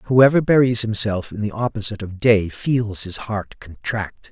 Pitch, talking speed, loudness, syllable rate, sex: 110 Hz, 165 wpm, -20 LUFS, 4.5 syllables/s, male